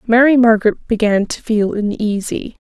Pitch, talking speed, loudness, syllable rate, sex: 220 Hz, 135 wpm, -15 LUFS, 4.8 syllables/s, female